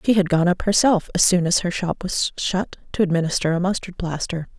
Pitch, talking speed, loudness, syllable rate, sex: 180 Hz, 225 wpm, -20 LUFS, 5.5 syllables/s, female